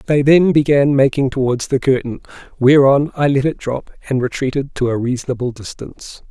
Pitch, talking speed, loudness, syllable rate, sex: 135 Hz, 170 wpm, -16 LUFS, 5.5 syllables/s, male